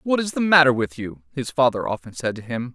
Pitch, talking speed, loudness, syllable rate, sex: 140 Hz, 260 wpm, -21 LUFS, 5.8 syllables/s, male